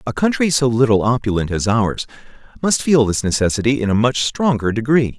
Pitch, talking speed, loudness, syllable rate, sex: 120 Hz, 185 wpm, -17 LUFS, 5.5 syllables/s, male